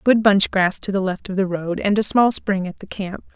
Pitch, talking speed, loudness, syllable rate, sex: 195 Hz, 285 wpm, -20 LUFS, 5.1 syllables/s, female